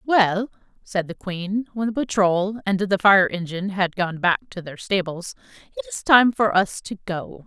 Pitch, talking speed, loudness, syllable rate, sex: 200 Hz, 195 wpm, -21 LUFS, 4.5 syllables/s, female